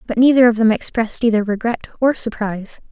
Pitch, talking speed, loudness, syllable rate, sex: 225 Hz, 185 wpm, -17 LUFS, 6.2 syllables/s, female